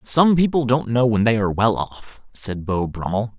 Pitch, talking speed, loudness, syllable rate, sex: 115 Hz, 215 wpm, -19 LUFS, 4.7 syllables/s, male